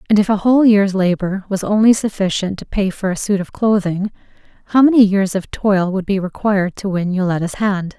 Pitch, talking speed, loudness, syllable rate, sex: 195 Hz, 210 wpm, -16 LUFS, 5.5 syllables/s, female